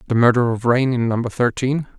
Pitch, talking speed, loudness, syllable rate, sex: 120 Hz, 210 wpm, -18 LUFS, 5.3 syllables/s, male